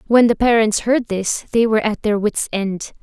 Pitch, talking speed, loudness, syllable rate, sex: 220 Hz, 220 wpm, -17 LUFS, 4.7 syllables/s, female